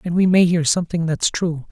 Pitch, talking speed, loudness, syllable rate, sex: 170 Hz, 245 wpm, -18 LUFS, 5.6 syllables/s, male